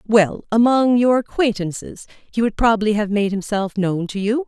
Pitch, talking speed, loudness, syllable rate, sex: 215 Hz, 160 wpm, -18 LUFS, 4.8 syllables/s, female